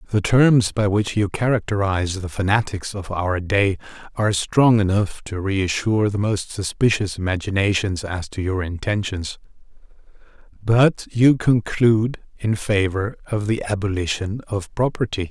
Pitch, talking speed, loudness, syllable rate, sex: 100 Hz, 135 wpm, -20 LUFS, 4.5 syllables/s, male